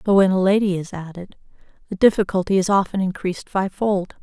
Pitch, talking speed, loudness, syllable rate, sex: 190 Hz, 170 wpm, -20 LUFS, 6.2 syllables/s, female